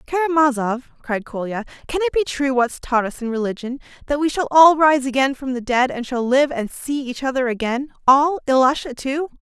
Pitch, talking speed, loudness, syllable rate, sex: 270 Hz, 205 wpm, -19 LUFS, 5.2 syllables/s, female